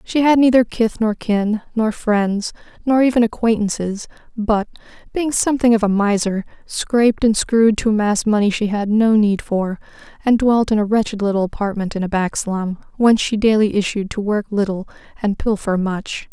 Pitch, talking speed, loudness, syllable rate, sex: 215 Hz, 180 wpm, -18 LUFS, 5.1 syllables/s, female